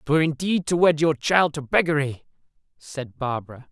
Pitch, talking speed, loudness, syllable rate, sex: 150 Hz, 160 wpm, -22 LUFS, 5.2 syllables/s, male